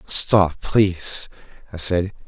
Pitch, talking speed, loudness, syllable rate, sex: 90 Hz, 105 wpm, -19 LUFS, 3.1 syllables/s, male